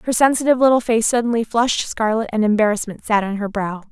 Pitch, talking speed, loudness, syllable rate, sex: 225 Hz, 200 wpm, -18 LUFS, 6.5 syllables/s, female